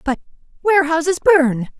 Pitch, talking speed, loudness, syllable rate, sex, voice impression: 315 Hz, 100 wpm, -16 LUFS, 5.3 syllables/s, female, feminine, adult-like, tensed, powerful, slightly bright, clear, slightly fluent, intellectual, slightly friendly, unique, elegant, lively, slightly intense